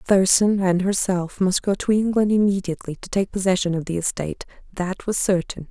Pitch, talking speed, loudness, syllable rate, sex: 185 Hz, 180 wpm, -21 LUFS, 5.4 syllables/s, female